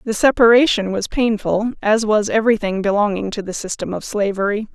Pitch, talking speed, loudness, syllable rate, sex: 215 Hz, 165 wpm, -17 LUFS, 5.5 syllables/s, female